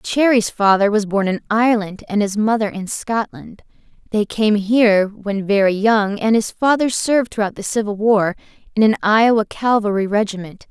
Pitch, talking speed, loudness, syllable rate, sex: 210 Hz, 170 wpm, -17 LUFS, 5.0 syllables/s, female